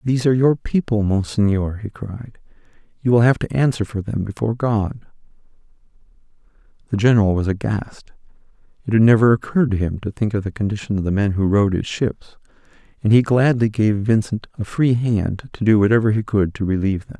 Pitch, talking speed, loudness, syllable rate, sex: 110 Hz, 190 wpm, -19 LUFS, 5.8 syllables/s, male